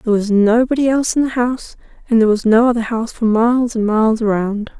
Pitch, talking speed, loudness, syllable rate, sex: 230 Hz, 225 wpm, -15 LUFS, 6.6 syllables/s, female